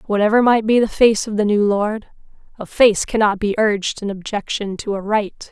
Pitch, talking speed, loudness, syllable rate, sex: 210 Hz, 205 wpm, -17 LUFS, 5.1 syllables/s, female